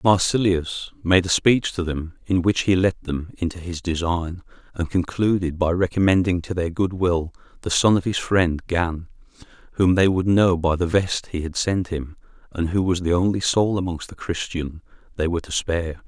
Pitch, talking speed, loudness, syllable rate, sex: 90 Hz, 195 wpm, -22 LUFS, 4.9 syllables/s, male